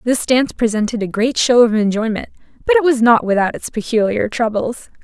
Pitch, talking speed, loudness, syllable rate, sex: 230 Hz, 190 wpm, -16 LUFS, 5.6 syllables/s, female